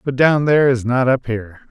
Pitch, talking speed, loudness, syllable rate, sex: 130 Hz, 245 wpm, -16 LUFS, 5.7 syllables/s, male